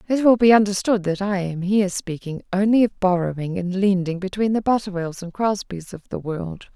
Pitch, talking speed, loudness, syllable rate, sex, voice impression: 190 Hz, 195 wpm, -21 LUFS, 5.4 syllables/s, female, feminine, gender-neutral, very adult-like, middle-aged, slightly relaxed, slightly powerful, slightly dark, slightly soft, clear, fluent, slightly raspy, cute, slightly cool, very intellectual, refreshing, very sincere, very calm, very friendly, very reassuring, very unique, elegant, very wild, very sweet, slightly lively, very kind, modest, slightly light